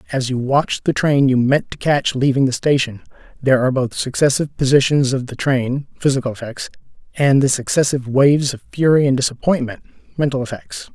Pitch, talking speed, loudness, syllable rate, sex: 135 Hz, 180 wpm, -17 LUFS, 5.6 syllables/s, male